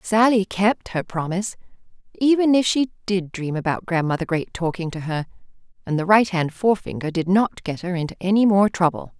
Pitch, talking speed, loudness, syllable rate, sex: 190 Hz, 175 wpm, -21 LUFS, 5.4 syllables/s, female